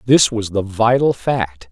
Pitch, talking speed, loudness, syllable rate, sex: 110 Hz, 175 wpm, -17 LUFS, 3.9 syllables/s, male